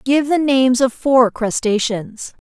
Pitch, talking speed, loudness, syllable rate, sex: 250 Hz, 145 wpm, -16 LUFS, 4.0 syllables/s, female